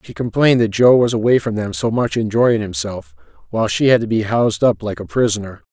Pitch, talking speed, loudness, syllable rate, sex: 115 Hz, 230 wpm, -17 LUFS, 6.0 syllables/s, male